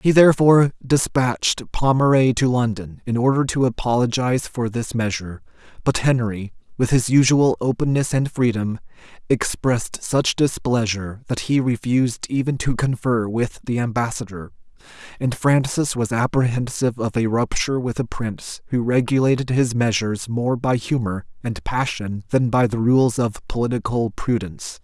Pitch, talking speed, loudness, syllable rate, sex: 120 Hz, 145 wpm, -20 LUFS, 5.0 syllables/s, male